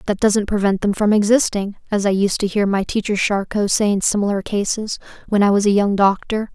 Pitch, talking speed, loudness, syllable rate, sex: 205 Hz, 220 wpm, -18 LUFS, 5.5 syllables/s, female